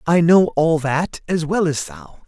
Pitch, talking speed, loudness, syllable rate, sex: 155 Hz, 210 wpm, -18 LUFS, 3.9 syllables/s, male